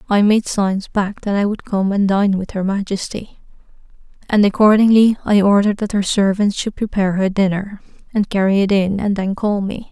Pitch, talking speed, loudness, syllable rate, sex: 200 Hz, 195 wpm, -16 LUFS, 5.2 syllables/s, female